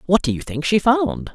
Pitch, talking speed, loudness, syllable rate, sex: 160 Hz, 270 wpm, -19 LUFS, 5.0 syllables/s, male